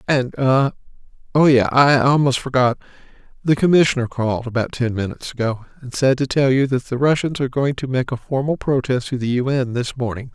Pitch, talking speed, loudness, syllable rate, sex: 130 Hz, 195 wpm, -19 LUFS, 5.6 syllables/s, female